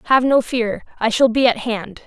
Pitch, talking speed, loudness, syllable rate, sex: 230 Hz, 235 wpm, -18 LUFS, 4.8 syllables/s, female